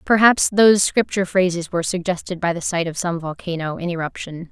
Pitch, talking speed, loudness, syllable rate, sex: 180 Hz, 185 wpm, -19 LUFS, 5.9 syllables/s, female